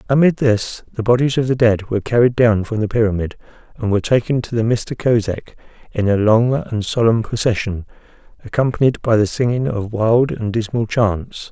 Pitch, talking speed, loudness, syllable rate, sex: 115 Hz, 180 wpm, -17 LUFS, 5.3 syllables/s, male